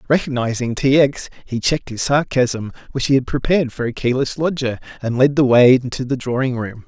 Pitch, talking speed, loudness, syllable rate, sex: 130 Hz, 200 wpm, -18 LUFS, 5.6 syllables/s, male